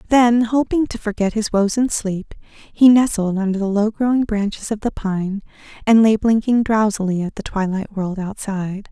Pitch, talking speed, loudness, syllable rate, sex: 210 Hz, 180 wpm, -18 LUFS, 4.8 syllables/s, female